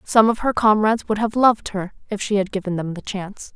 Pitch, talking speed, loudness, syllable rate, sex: 205 Hz, 255 wpm, -20 LUFS, 6.0 syllables/s, female